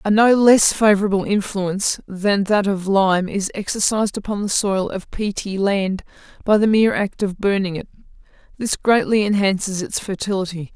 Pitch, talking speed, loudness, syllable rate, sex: 200 Hz, 160 wpm, -19 LUFS, 5.0 syllables/s, female